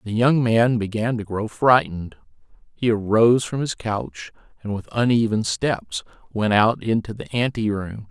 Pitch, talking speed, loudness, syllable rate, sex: 110 Hz, 155 wpm, -21 LUFS, 4.6 syllables/s, male